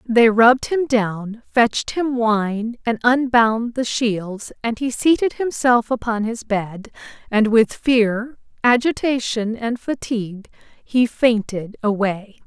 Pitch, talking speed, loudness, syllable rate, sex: 230 Hz, 130 wpm, -19 LUFS, 3.6 syllables/s, female